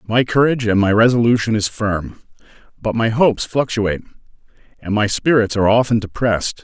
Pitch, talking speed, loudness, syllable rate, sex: 110 Hz, 155 wpm, -17 LUFS, 5.8 syllables/s, male